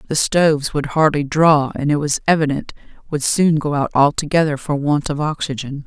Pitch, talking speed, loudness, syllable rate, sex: 145 Hz, 185 wpm, -17 LUFS, 5.2 syllables/s, female